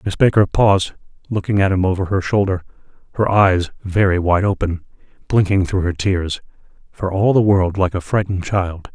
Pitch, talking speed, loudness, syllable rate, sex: 95 Hz, 175 wpm, -17 LUFS, 5.2 syllables/s, male